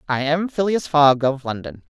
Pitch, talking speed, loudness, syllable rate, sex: 150 Hz, 185 wpm, -19 LUFS, 4.7 syllables/s, female